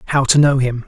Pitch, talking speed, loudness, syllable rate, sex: 135 Hz, 275 wpm, -14 LUFS, 6.6 syllables/s, male